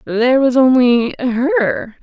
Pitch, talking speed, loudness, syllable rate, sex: 245 Hz, 120 wpm, -14 LUFS, 3.4 syllables/s, female